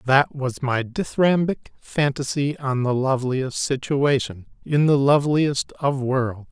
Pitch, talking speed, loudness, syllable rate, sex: 135 Hz, 130 wpm, -22 LUFS, 4.1 syllables/s, male